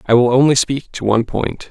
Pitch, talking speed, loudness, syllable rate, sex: 125 Hz, 245 wpm, -15 LUFS, 5.7 syllables/s, male